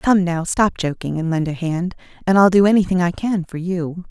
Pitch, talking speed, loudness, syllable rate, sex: 180 Hz, 235 wpm, -18 LUFS, 5.1 syllables/s, female